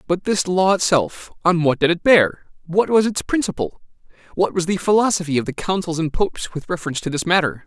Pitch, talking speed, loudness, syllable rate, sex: 180 Hz, 195 wpm, -19 LUFS, 5.9 syllables/s, male